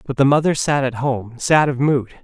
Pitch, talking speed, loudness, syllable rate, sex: 135 Hz, 240 wpm, -18 LUFS, 5.1 syllables/s, male